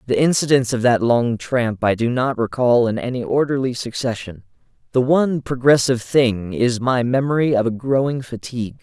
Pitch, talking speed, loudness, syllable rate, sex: 125 Hz, 170 wpm, -18 LUFS, 5.2 syllables/s, male